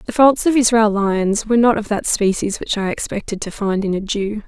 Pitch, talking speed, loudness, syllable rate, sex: 215 Hz, 240 wpm, -17 LUFS, 5.4 syllables/s, female